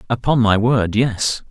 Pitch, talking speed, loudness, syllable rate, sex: 115 Hz, 160 wpm, -17 LUFS, 3.9 syllables/s, male